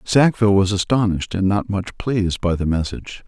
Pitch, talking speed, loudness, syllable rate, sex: 100 Hz, 185 wpm, -19 LUFS, 5.7 syllables/s, male